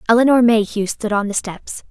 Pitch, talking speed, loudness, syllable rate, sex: 220 Hz, 190 wpm, -16 LUFS, 5.3 syllables/s, female